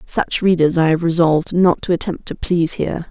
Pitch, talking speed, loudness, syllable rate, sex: 170 Hz, 210 wpm, -17 LUFS, 5.7 syllables/s, female